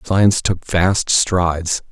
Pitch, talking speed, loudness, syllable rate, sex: 90 Hz, 125 wpm, -16 LUFS, 3.4 syllables/s, male